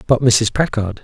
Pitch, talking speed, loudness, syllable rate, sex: 120 Hz, 175 wpm, -16 LUFS, 4.6 syllables/s, male